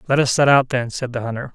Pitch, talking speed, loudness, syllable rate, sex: 130 Hz, 310 wpm, -18 LUFS, 6.5 syllables/s, male